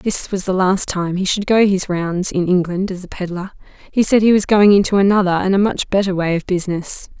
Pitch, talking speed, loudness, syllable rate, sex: 190 Hz, 240 wpm, -16 LUFS, 5.5 syllables/s, female